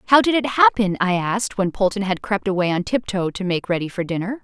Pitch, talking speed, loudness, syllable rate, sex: 200 Hz, 255 wpm, -20 LUFS, 6.0 syllables/s, female